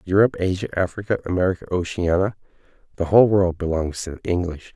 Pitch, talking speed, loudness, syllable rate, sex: 90 Hz, 150 wpm, -21 LUFS, 6.9 syllables/s, male